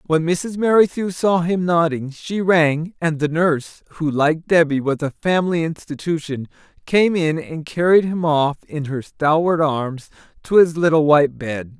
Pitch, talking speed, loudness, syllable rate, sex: 160 Hz, 160 wpm, -18 LUFS, 4.5 syllables/s, male